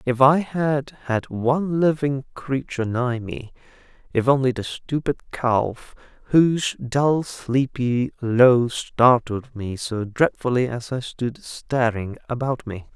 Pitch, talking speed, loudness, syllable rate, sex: 125 Hz, 125 wpm, -22 LUFS, 3.7 syllables/s, male